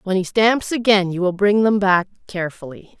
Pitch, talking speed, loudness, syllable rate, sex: 195 Hz, 200 wpm, -18 LUFS, 5.2 syllables/s, female